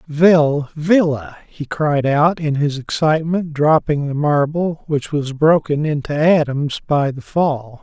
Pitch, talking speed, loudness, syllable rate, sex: 150 Hz, 140 wpm, -17 LUFS, 3.8 syllables/s, male